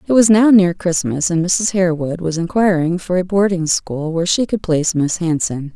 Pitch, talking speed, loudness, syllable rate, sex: 175 Hz, 210 wpm, -16 LUFS, 5.2 syllables/s, female